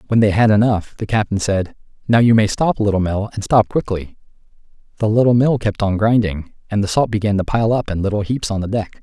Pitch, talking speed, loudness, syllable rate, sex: 105 Hz, 235 wpm, -17 LUFS, 5.8 syllables/s, male